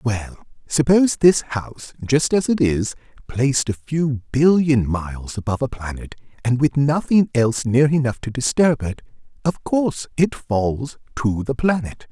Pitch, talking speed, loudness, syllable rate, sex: 130 Hz, 160 wpm, -20 LUFS, 4.5 syllables/s, male